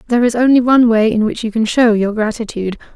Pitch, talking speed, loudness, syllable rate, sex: 225 Hz, 245 wpm, -14 LUFS, 7.0 syllables/s, female